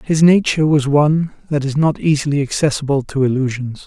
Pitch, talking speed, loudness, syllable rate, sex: 145 Hz, 170 wpm, -16 LUFS, 5.8 syllables/s, male